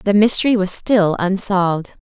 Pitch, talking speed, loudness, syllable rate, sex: 195 Hz, 150 wpm, -16 LUFS, 4.9 syllables/s, female